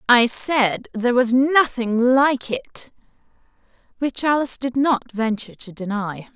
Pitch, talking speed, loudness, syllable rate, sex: 245 Hz, 130 wpm, -19 LUFS, 4.3 syllables/s, female